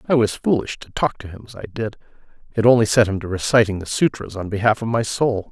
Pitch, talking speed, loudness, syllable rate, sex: 110 Hz, 240 wpm, -20 LUFS, 6.1 syllables/s, male